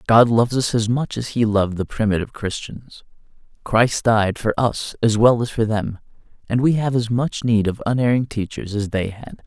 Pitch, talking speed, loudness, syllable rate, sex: 115 Hz, 205 wpm, -20 LUFS, 5.1 syllables/s, male